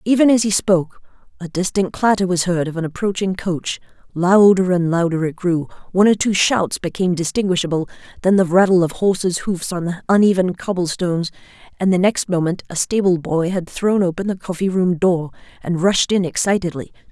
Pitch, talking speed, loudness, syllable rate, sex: 180 Hz, 185 wpm, -18 LUFS, 5.5 syllables/s, female